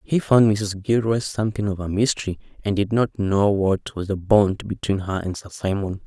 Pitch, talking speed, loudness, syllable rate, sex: 100 Hz, 210 wpm, -22 LUFS, 5.0 syllables/s, male